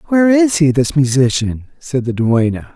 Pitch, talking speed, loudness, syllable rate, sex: 145 Hz, 175 wpm, -14 LUFS, 4.9 syllables/s, male